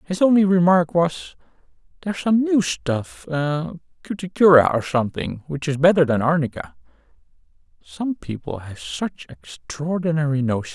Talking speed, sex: 135 wpm, male